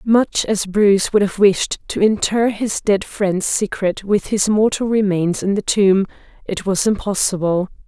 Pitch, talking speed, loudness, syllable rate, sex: 200 Hz, 170 wpm, -17 LUFS, 4.2 syllables/s, female